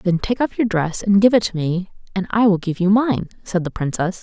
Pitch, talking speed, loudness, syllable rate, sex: 195 Hz, 270 wpm, -19 LUFS, 5.3 syllables/s, female